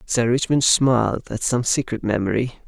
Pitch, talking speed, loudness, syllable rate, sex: 120 Hz, 155 wpm, -20 LUFS, 5.0 syllables/s, male